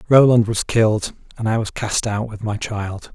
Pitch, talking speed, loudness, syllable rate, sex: 110 Hz, 210 wpm, -19 LUFS, 4.7 syllables/s, male